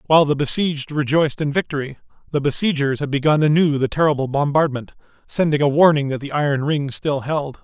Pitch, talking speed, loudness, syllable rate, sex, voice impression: 145 Hz, 180 wpm, -19 LUFS, 6.0 syllables/s, male, masculine, adult-like, slightly thin, tensed, powerful, bright, clear, fluent, intellectual, refreshing, calm, lively, slightly strict